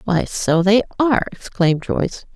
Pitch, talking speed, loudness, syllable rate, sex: 195 Hz, 155 wpm, -18 LUFS, 5.0 syllables/s, female